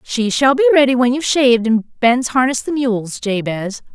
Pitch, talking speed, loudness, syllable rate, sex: 240 Hz, 200 wpm, -15 LUFS, 5.2 syllables/s, female